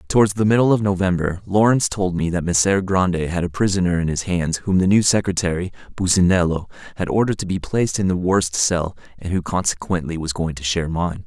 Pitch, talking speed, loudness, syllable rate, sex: 90 Hz, 210 wpm, -19 LUFS, 6.0 syllables/s, male